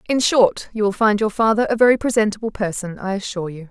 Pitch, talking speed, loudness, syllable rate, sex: 210 Hz, 225 wpm, -19 LUFS, 6.4 syllables/s, female